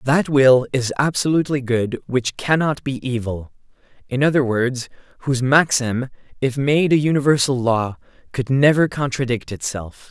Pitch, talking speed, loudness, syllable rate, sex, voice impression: 130 Hz, 135 wpm, -19 LUFS, 4.7 syllables/s, male, masculine, adult-like, tensed, powerful, bright, clear, fluent, intellectual, refreshing, slightly calm, friendly, lively, slightly kind, slightly light